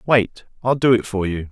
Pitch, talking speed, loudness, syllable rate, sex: 110 Hz, 240 wpm, -19 LUFS, 4.8 syllables/s, male